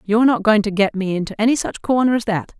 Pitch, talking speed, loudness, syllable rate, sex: 215 Hz, 275 wpm, -18 LUFS, 6.5 syllables/s, female